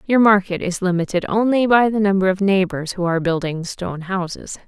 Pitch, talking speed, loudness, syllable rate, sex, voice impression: 190 Hz, 190 wpm, -18 LUFS, 5.5 syllables/s, female, feminine, adult-like, slightly tensed, intellectual, elegant